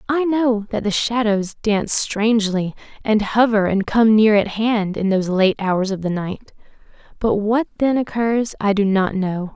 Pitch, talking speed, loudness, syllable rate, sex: 210 Hz, 180 wpm, -18 LUFS, 4.4 syllables/s, female